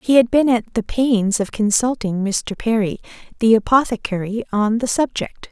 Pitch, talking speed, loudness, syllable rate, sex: 225 Hz, 165 wpm, -18 LUFS, 4.7 syllables/s, female